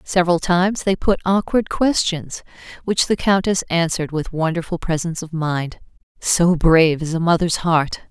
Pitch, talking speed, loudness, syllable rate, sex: 170 Hz, 155 wpm, -19 LUFS, 5.0 syllables/s, female